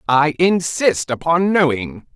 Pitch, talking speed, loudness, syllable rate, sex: 155 Hz, 110 wpm, -17 LUFS, 3.7 syllables/s, male